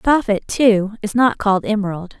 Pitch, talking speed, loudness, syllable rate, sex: 215 Hz, 190 wpm, -17 LUFS, 5.6 syllables/s, female